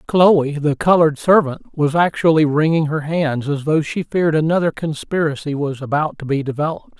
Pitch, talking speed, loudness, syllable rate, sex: 155 Hz, 170 wpm, -17 LUFS, 5.4 syllables/s, male